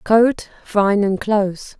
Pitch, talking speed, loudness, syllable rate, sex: 205 Hz, 100 wpm, -18 LUFS, 3.1 syllables/s, female